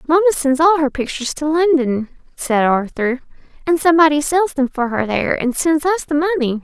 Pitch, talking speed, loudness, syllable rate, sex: 290 Hz, 190 wpm, -16 LUFS, 5.6 syllables/s, female